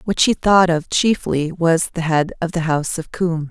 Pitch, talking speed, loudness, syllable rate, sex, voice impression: 170 Hz, 225 wpm, -18 LUFS, 4.9 syllables/s, female, feminine, adult-like, clear, intellectual, elegant